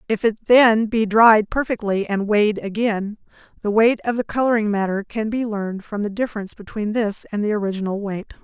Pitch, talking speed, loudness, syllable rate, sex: 215 Hz, 190 wpm, -20 LUFS, 5.6 syllables/s, female